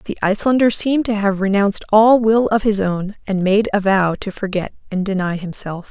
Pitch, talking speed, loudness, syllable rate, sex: 205 Hz, 205 wpm, -17 LUFS, 5.4 syllables/s, female